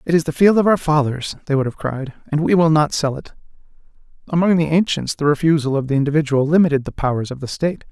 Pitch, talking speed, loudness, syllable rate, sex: 150 Hz, 235 wpm, -18 LUFS, 6.5 syllables/s, male